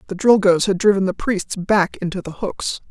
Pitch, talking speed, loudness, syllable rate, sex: 195 Hz, 205 wpm, -18 LUFS, 4.9 syllables/s, female